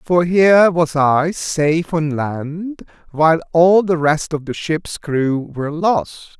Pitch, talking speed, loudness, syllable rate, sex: 160 Hz, 160 wpm, -16 LUFS, 3.6 syllables/s, male